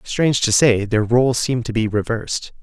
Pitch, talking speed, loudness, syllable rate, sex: 120 Hz, 205 wpm, -18 LUFS, 5.7 syllables/s, male